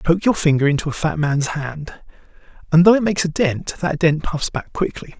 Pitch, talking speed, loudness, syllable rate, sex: 160 Hz, 220 wpm, -18 LUFS, 5.3 syllables/s, male